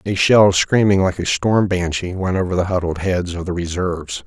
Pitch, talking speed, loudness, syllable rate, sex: 90 Hz, 210 wpm, -18 LUFS, 5.1 syllables/s, male